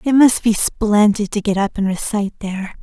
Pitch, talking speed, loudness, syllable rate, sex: 210 Hz, 210 wpm, -17 LUFS, 5.4 syllables/s, female